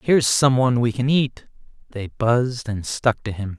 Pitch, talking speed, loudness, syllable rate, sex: 120 Hz, 200 wpm, -20 LUFS, 5.0 syllables/s, male